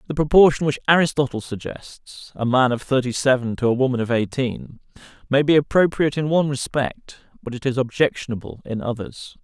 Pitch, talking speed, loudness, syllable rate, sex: 130 Hz, 170 wpm, -20 LUFS, 4.4 syllables/s, male